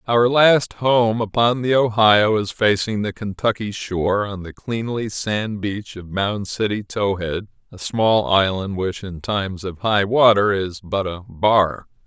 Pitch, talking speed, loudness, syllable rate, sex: 105 Hz, 165 wpm, -19 LUFS, 4.0 syllables/s, male